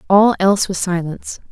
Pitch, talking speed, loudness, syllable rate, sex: 190 Hz, 160 wpm, -16 LUFS, 5.8 syllables/s, female